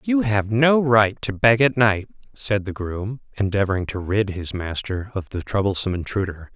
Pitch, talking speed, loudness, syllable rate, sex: 105 Hz, 185 wpm, -21 LUFS, 4.8 syllables/s, male